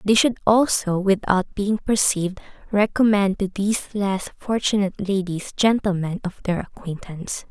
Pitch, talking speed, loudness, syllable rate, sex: 200 Hz, 130 wpm, -21 LUFS, 4.8 syllables/s, female